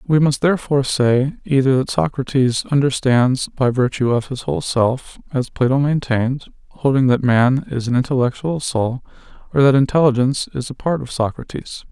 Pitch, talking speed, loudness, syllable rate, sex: 130 Hz, 160 wpm, -18 LUFS, 5.2 syllables/s, male